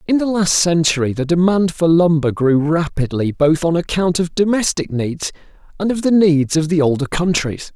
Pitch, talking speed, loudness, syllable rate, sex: 165 Hz, 185 wpm, -16 LUFS, 4.9 syllables/s, male